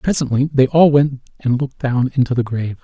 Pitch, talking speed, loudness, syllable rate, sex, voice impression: 130 Hz, 210 wpm, -16 LUFS, 6.0 syllables/s, male, very masculine, adult-like, slightly middle-aged, slightly thick, slightly relaxed, slightly weak, slightly dark, hard, slightly clear, very fluent, slightly raspy, very intellectual, slightly refreshing, very sincere, very calm, slightly mature, friendly, reassuring, very unique, elegant, slightly sweet, slightly lively, very kind, very modest